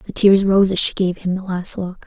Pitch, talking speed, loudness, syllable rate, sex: 190 Hz, 290 wpm, -17 LUFS, 5.0 syllables/s, female